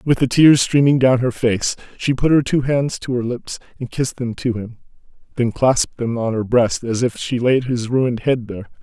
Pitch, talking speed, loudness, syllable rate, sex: 125 Hz, 230 wpm, -18 LUFS, 5.1 syllables/s, male